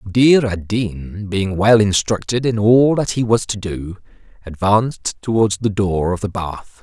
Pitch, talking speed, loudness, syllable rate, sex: 105 Hz, 175 wpm, -17 LUFS, 4.1 syllables/s, male